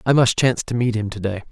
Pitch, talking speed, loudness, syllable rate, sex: 115 Hz, 320 wpm, -20 LUFS, 6.8 syllables/s, male